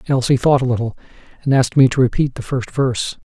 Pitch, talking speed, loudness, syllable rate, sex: 130 Hz, 220 wpm, -17 LUFS, 6.6 syllables/s, male